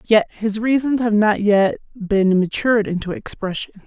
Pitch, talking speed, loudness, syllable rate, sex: 210 Hz, 155 wpm, -18 LUFS, 4.6 syllables/s, female